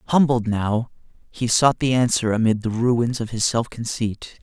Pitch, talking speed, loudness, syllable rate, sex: 115 Hz, 175 wpm, -21 LUFS, 4.2 syllables/s, male